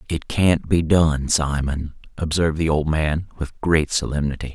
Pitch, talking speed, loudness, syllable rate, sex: 80 Hz, 160 wpm, -21 LUFS, 4.4 syllables/s, male